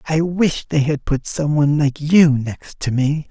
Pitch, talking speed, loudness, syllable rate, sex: 150 Hz, 220 wpm, -18 LUFS, 4.2 syllables/s, male